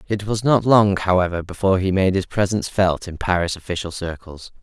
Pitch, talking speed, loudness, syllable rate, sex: 95 Hz, 195 wpm, -20 LUFS, 5.7 syllables/s, male